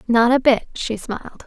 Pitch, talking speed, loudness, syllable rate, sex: 235 Hz, 205 wpm, -19 LUFS, 4.8 syllables/s, female